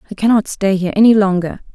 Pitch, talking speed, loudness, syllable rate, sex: 200 Hz, 205 wpm, -14 LUFS, 7.2 syllables/s, female